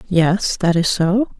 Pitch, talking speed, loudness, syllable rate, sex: 185 Hz, 170 wpm, -17 LUFS, 3.4 syllables/s, female